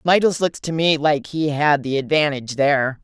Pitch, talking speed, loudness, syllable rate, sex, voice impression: 150 Hz, 200 wpm, -19 LUFS, 5.1 syllables/s, female, feminine, adult-like, slightly intellectual, slightly elegant, slightly strict